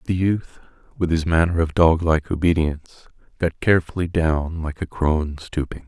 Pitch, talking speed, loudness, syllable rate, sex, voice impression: 80 Hz, 155 wpm, -21 LUFS, 5.2 syllables/s, male, very masculine, very adult-like, slightly old, relaxed, very powerful, dark, soft, very muffled, fluent, very raspy, very cool, very intellectual, slightly sincere, very calm, very mature, very friendly, very reassuring, very unique, very elegant, slightly wild, very sweet, slightly lively, very kind, slightly modest